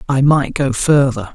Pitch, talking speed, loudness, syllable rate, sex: 135 Hz, 180 wpm, -15 LUFS, 4.3 syllables/s, male